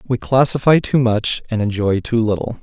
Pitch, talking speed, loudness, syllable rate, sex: 115 Hz, 185 wpm, -16 LUFS, 5.1 syllables/s, male